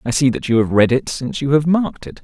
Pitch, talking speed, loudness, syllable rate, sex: 135 Hz, 325 wpm, -17 LUFS, 6.6 syllables/s, male